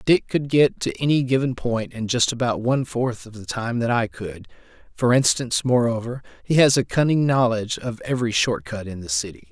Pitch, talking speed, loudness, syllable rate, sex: 120 Hz, 200 wpm, -21 LUFS, 5.4 syllables/s, male